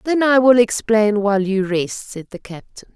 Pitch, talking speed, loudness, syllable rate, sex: 215 Hz, 205 wpm, -16 LUFS, 4.7 syllables/s, female